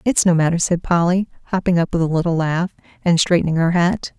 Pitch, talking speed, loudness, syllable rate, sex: 175 Hz, 215 wpm, -18 LUFS, 5.9 syllables/s, female